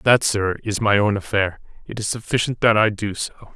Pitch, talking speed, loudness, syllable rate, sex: 105 Hz, 220 wpm, -20 LUFS, 5.0 syllables/s, male